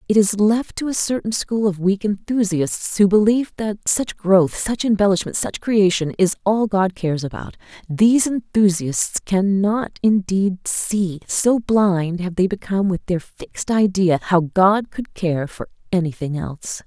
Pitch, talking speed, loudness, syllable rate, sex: 195 Hz, 165 wpm, -19 LUFS, 4.4 syllables/s, female